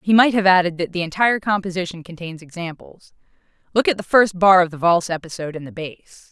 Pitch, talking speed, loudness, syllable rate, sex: 180 Hz, 200 wpm, -18 LUFS, 6.2 syllables/s, female